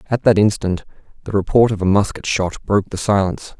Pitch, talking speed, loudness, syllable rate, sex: 100 Hz, 200 wpm, -18 LUFS, 6.1 syllables/s, male